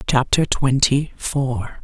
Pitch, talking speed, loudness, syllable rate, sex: 135 Hz, 100 wpm, -19 LUFS, 3.1 syllables/s, female